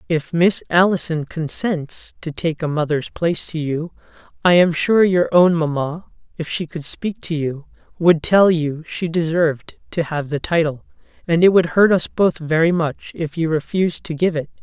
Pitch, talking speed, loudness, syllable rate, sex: 165 Hz, 190 wpm, -18 LUFS, 4.6 syllables/s, female